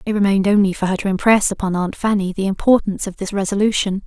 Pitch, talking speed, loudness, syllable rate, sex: 200 Hz, 220 wpm, -18 LUFS, 6.9 syllables/s, female